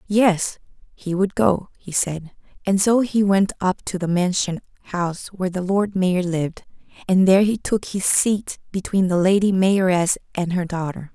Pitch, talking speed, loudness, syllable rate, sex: 185 Hz, 180 wpm, -20 LUFS, 4.6 syllables/s, female